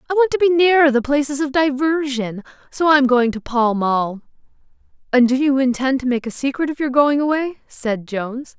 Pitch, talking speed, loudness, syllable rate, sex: 270 Hz, 205 wpm, -18 LUFS, 5.3 syllables/s, female